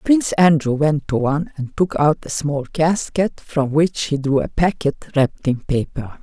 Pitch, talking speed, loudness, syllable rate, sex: 150 Hz, 195 wpm, -19 LUFS, 4.6 syllables/s, female